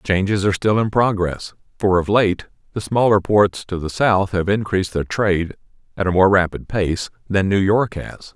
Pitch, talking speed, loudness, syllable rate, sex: 100 Hz, 195 wpm, -18 LUFS, 4.8 syllables/s, male